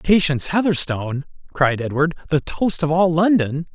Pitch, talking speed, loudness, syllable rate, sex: 160 Hz, 145 wpm, -19 LUFS, 5.0 syllables/s, male